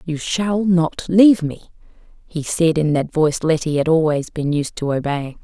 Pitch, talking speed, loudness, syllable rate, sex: 160 Hz, 190 wpm, -18 LUFS, 4.8 syllables/s, female